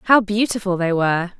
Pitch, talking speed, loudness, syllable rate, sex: 195 Hz, 170 wpm, -19 LUFS, 5.4 syllables/s, female